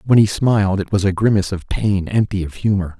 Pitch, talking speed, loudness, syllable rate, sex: 100 Hz, 240 wpm, -18 LUFS, 5.9 syllables/s, male